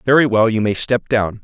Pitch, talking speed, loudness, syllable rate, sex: 115 Hz, 250 wpm, -16 LUFS, 5.3 syllables/s, male